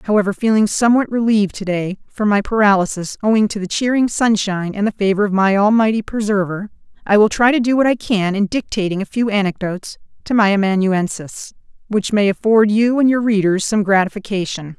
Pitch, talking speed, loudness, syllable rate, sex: 205 Hz, 185 wpm, -16 LUFS, 5.8 syllables/s, female